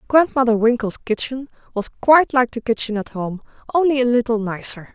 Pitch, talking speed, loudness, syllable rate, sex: 240 Hz, 170 wpm, -19 LUFS, 5.4 syllables/s, female